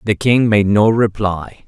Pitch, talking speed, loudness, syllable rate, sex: 105 Hz, 180 wpm, -14 LUFS, 3.9 syllables/s, male